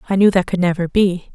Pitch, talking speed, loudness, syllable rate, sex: 185 Hz, 265 wpm, -16 LUFS, 6.1 syllables/s, female